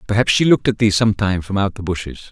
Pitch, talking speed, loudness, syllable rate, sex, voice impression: 100 Hz, 260 wpm, -17 LUFS, 7.7 syllables/s, male, masculine, middle-aged, tensed, slightly powerful, hard, clear, fluent, cool, intellectual, friendly, wild, strict, slightly sharp